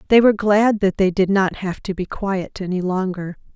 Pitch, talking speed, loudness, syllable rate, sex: 190 Hz, 220 wpm, -19 LUFS, 5.0 syllables/s, female